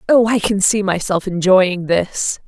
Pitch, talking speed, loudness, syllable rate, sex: 195 Hz, 170 wpm, -16 LUFS, 4.0 syllables/s, female